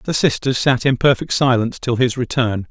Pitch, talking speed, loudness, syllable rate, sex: 125 Hz, 200 wpm, -17 LUFS, 5.2 syllables/s, male